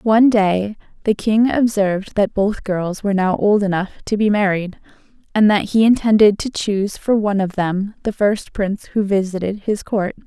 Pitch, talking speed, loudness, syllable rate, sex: 205 Hz, 185 wpm, -18 LUFS, 5.0 syllables/s, female